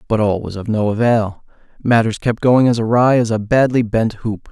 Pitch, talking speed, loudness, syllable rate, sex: 115 Hz, 200 wpm, -16 LUFS, 5.1 syllables/s, male